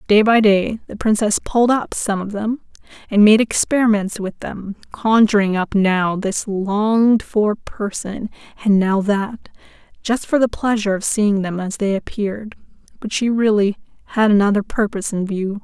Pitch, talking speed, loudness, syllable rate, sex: 210 Hz, 165 wpm, -18 LUFS, 4.7 syllables/s, female